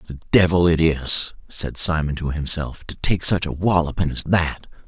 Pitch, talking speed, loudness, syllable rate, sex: 85 Hz, 195 wpm, -20 LUFS, 4.7 syllables/s, male